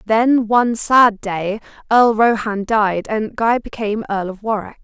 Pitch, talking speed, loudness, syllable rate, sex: 215 Hz, 160 wpm, -17 LUFS, 4.1 syllables/s, female